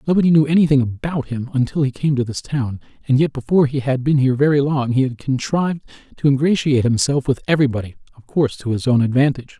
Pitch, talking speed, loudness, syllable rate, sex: 135 Hz, 205 wpm, -18 LUFS, 6.8 syllables/s, male